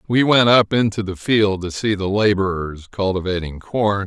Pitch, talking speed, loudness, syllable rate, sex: 100 Hz, 175 wpm, -18 LUFS, 4.6 syllables/s, male